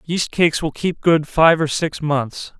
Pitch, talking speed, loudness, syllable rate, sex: 160 Hz, 210 wpm, -18 LUFS, 4.1 syllables/s, male